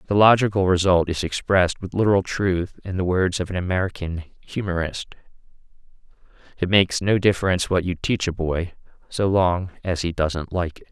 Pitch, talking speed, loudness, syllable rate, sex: 90 Hz, 170 wpm, -22 LUFS, 5.4 syllables/s, male